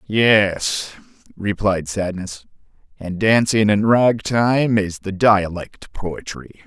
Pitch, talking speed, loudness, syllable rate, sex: 100 Hz, 110 wpm, -18 LUFS, 3.0 syllables/s, male